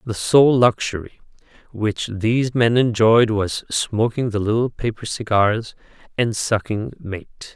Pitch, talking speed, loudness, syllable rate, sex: 110 Hz, 125 wpm, -19 LUFS, 3.9 syllables/s, male